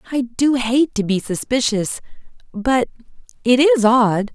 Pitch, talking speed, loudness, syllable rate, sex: 235 Hz, 110 wpm, -18 LUFS, 4.0 syllables/s, female